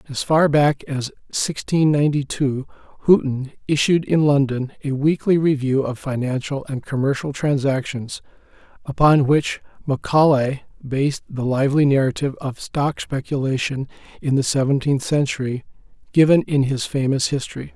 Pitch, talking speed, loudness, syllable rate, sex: 140 Hz, 130 wpm, -20 LUFS, 4.9 syllables/s, male